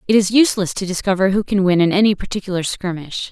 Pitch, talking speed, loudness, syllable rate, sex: 195 Hz, 215 wpm, -17 LUFS, 6.7 syllables/s, female